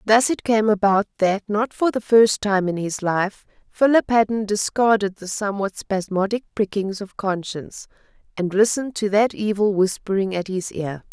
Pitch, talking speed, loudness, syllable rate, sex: 205 Hz, 165 wpm, -21 LUFS, 4.8 syllables/s, female